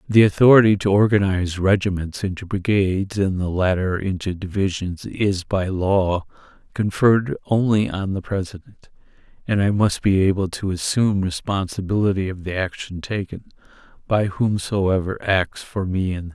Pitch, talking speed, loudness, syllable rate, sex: 95 Hz, 145 wpm, -20 LUFS, 5.0 syllables/s, male